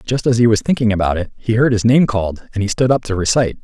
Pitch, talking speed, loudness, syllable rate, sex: 110 Hz, 295 wpm, -16 LUFS, 6.9 syllables/s, male